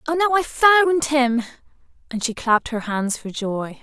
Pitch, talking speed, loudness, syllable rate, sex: 260 Hz, 190 wpm, -20 LUFS, 4.7 syllables/s, female